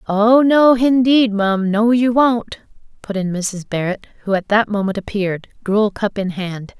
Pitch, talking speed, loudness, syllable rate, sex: 210 Hz, 170 wpm, -16 LUFS, 4.3 syllables/s, female